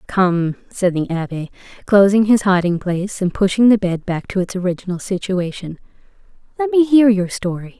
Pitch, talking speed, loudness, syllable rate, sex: 195 Hz, 170 wpm, -17 LUFS, 5.2 syllables/s, female